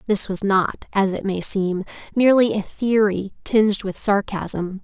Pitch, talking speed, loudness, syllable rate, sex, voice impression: 200 Hz, 160 wpm, -20 LUFS, 4.3 syllables/s, female, very feminine, slightly gender-neutral, young, slightly adult-like, very thin, slightly tensed, slightly powerful, bright, slightly hard, clear, fluent, cute, slightly cool, intellectual, slightly refreshing, slightly sincere, slightly calm, friendly, reassuring, unique, slightly strict, slightly sharp, slightly modest